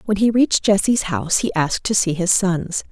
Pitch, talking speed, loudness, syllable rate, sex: 190 Hz, 225 wpm, -18 LUFS, 5.6 syllables/s, female